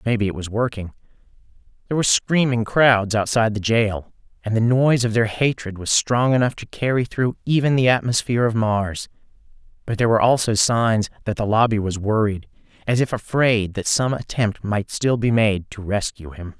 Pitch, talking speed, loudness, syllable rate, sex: 110 Hz, 185 wpm, -20 LUFS, 5.4 syllables/s, male